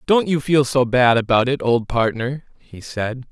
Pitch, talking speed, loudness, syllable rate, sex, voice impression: 130 Hz, 200 wpm, -18 LUFS, 4.3 syllables/s, male, very masculine, adult-like, middle-aged, thick, tensed, powerful, slightly bright, slightly soft, very clear, slightly muffled, fluent, cool, very intellectual, refreshing, very sincere, very calm, slightly mature, friendly, reassuring, unique, elegant, slightly wild, sweet, slightly lively, kind